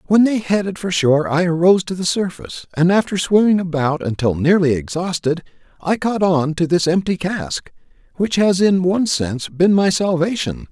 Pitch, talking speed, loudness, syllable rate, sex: 175 Hz, 175 wpm, -17 LUFS, 5.2 syllables/s, male